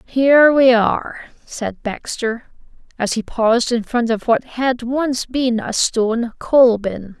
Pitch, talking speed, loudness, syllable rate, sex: 240 Hz, 160 wpm, -17 LUFS, 3.8 syllables/s, female